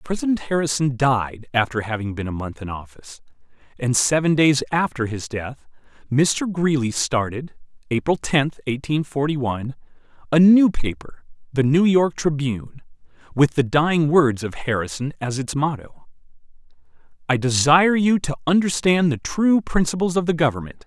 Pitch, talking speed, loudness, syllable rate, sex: 145 Hz, 145 wpm, -20 LUFS, 4.9 syllables/s, male